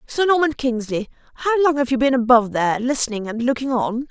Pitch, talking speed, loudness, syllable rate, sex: 250 Hz, 205 wpm, -19 LUFS, 6.1 syllables/s, female